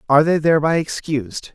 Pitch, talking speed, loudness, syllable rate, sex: 150 Hz, 155 wpm, -18 LUFS, 6.6 syllables/s, male